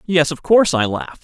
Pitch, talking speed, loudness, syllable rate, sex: 160 Hz, 245 wpm, -16 LUFS, 6.3 syllables/s, male